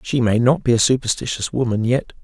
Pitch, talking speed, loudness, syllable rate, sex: 120 Hz, 215 wpm, -18 LUFS, 6.1 syllables/s, male